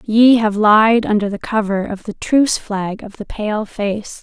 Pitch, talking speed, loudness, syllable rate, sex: 215 Hz, 200 wpm, -16 LUFS, 4.1 syllables/s, female